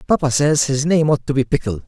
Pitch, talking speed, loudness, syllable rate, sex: 140 Hz, 255 wpm, -17 LUFS, 6.0 syllables/s, male